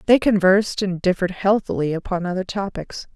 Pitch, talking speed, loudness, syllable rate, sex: 190 Hz, 150 wpm, -20 LUFS, 5.8 syllables/s, female